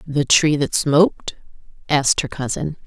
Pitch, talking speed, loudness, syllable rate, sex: 145 Hz, 145 wpm, -18 LUFS, 4.7 syllables/s, female